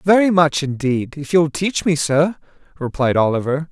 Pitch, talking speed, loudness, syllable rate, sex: 155 Hz, 160 wpm, -18 LUFS, 4.7 syllables/s, male